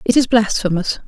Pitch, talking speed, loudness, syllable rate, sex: 215 Hz, 165 wpm, -16 LUFS, 5.3 syllables/s, female